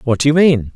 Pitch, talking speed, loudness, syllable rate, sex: 135 Hz, 320 wpm, -13 LUFS, 6.2 syllables/s, male